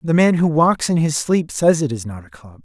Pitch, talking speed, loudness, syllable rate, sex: 145 Hz, 295 wpm, -17 LUFS, 5.1 syllables/s, male